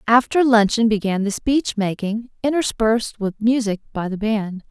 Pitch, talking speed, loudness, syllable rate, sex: 220 Hz, 155 wpm, -20 LUFS, 4.7 syllables/s, female